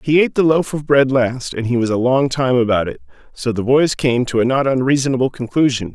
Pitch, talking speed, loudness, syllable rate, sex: 130 Hz, 240 wpm, -16 LUFS, 5.8 syllables/s, male